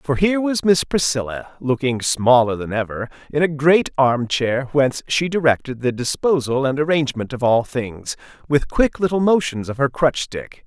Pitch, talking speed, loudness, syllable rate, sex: 140 Hz, 180 wpm, -19 LUFS, 4.9 syllables/s, male